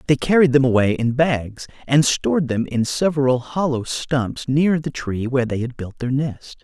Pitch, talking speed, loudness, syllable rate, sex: 135 Hz, 200 wpm, -19 LUFS, 4.7 syllables/s, male